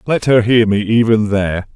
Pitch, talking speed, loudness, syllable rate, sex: 110 Hz, 205 wpm, -14 LUFS, 5.1 syllables/s, male